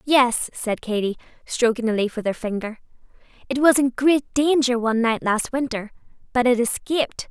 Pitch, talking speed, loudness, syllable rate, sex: 245 Hz, 170 wpm, -21 LUFS, 5.1 syllables/s, female